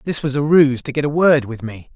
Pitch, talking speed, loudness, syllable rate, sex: 140 Hz, 305 wpm, -16 LUFS, 5.5 syllables/s, male